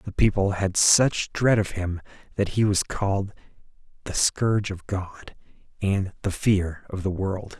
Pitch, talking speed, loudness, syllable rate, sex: 100 Hz, 165 wpm, -24 LUFS, 4.1 syllables/s, male